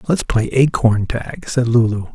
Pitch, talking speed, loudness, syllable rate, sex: 120 Hz, 170 wpm, -17 LUFS, 4.3 syllables/s, male